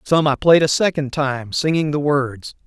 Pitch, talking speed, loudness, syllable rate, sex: 145 Hz, 205 wpm, -18 LUFS, 4.4 syllables/s, male